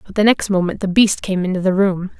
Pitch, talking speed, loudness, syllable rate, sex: 190 Hz, 275 wpm, -17 LUFS, 6.0 syllables/s, female